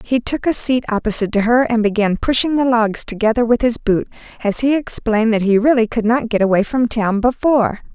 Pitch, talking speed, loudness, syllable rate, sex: 230 Hz, 220 wpm, -16 LUFS, 5.7 syllables/s, female